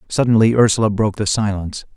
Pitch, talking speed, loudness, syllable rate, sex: 105 Hz, 155 wpm, -16 LUFS, 7.0 syllables/s, male